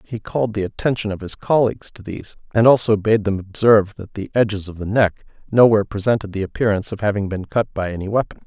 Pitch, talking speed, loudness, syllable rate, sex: 105 Hz, 220 wpm, -19 LUFS, 6.6 syllables/s, male